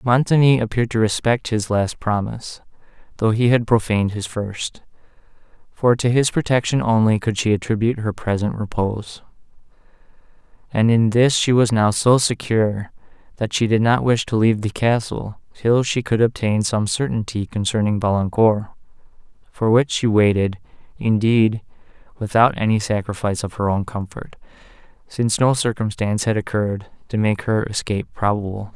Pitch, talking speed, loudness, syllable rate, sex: 110 Hz, 150 wpm, -19 LUFS, 5.2 syllables/s, male